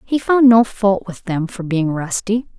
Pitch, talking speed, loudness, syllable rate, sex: 200 Hz, 210 wpm, -16 LUFS, 4.2 syllables/s, female